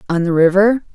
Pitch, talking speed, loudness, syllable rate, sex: 190 Hz, 190 wpm, -14 LUFS, 5.9 syllables/s, female